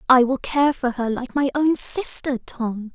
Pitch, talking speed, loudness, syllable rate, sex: 260 Hz, 205 wpm, -21 LUFS, 4.0 syllables/s, female